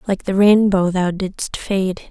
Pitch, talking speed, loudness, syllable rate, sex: 190 Hz, 170 wpm, -17 LUFS, 3.7 syllables/s, female